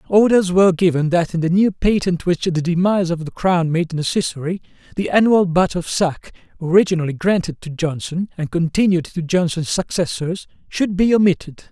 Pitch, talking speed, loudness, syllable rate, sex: 175 Hz, 170 wpm, -18 LUFS, 5.3 syllables/s, male